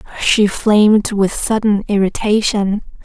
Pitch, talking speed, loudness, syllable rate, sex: 210 Hz, 100 wpm, -14 LUFS, 4.1 syllables/s, female